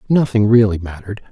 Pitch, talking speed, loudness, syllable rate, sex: 110 Hz, 135 wpm, -15 LUFS, 6.5 syllables/s, male